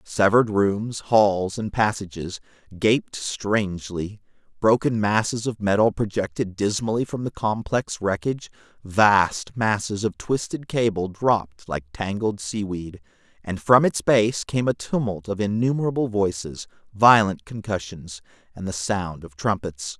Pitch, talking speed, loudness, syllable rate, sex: 105 Hz, 130 wpm, -23 LUFS, 4.2 syllables/s, male